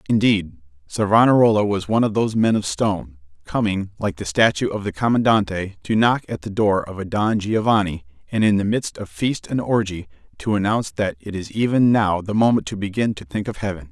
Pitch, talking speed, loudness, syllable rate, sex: 100 Hz, 205 wpm, -20 LUFS, 5.6 syllables/s, male